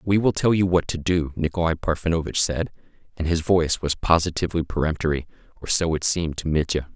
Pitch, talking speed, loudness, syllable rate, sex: 80 Hz, 190 wpm, -23 LUFS, 6.2 syllables/s, male